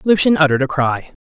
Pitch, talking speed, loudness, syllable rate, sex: 170 Hz, 195 wpm, -15 LUFS, 6.7 syllables/s, female